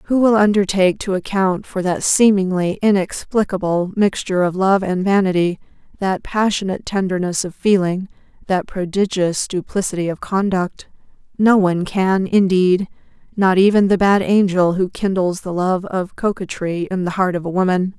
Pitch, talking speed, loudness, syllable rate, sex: 190 Hz, 150 wpm, -17 LUFS, 5.0 syllables/s, female